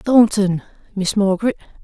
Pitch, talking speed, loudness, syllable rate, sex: 205 Hz, 100 wpm, -18 LUFS, 4.9 syllables/s, female